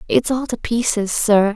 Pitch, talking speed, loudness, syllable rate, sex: 220 Hz, 195 wpm, -18 LUFS, 4.4 syllables/s, female